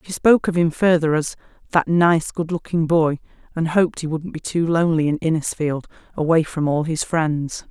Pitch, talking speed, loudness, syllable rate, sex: 160 Hz, 195 wpm, -20 LUFS, 5.2 syllables/s, female